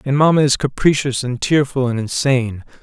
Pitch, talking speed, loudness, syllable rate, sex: 135 Hz, 170 wpm, -17 LUFS, 5.4 syllables/s, male